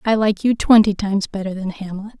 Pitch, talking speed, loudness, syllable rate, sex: 205 Hz, 220 wpm, -18 LUFS, 5.8 syllables/s, female